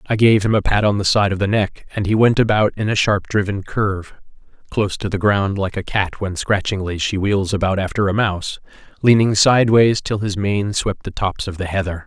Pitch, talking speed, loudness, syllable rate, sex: 100 Hz, 230 wpm, -18 LUFS, 5.4 syllables/s, male